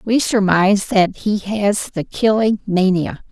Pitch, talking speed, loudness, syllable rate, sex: 205 Hz, 145 wpm, -17 LUFS, 3.9 syllables/s, female